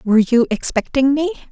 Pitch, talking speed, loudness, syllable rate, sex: 260 Hz, 160 wpm, -16 LUFS, 5.5 syllables/s, female